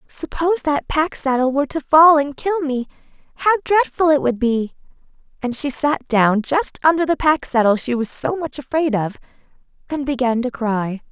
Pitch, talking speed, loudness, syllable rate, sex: 275 Hz, 185 wpm, -18 LUFS, 4.8 syllables/s, female